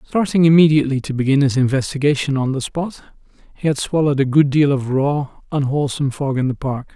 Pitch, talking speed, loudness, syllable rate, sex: 140 Hz, 190 wpm, -17 LUFS, 6.4 syllables/s, male